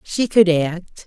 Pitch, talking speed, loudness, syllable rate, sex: 180 Hz, 170 wpm, -17 LUFS, 3.1 syllables/s, female